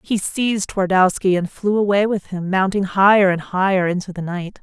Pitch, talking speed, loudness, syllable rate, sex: 190 Hz, 195 wpm, -18 LUFS, 5.1 syllables/s, female